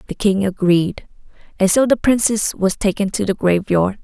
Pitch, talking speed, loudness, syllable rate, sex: 200 Hz, 180 wpm, -17 LUFS, 4.8 syllables/s, female